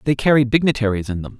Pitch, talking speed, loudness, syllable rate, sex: 125 Hz, 215 wpm, -18 LUFS, 7.2 syllables/s, male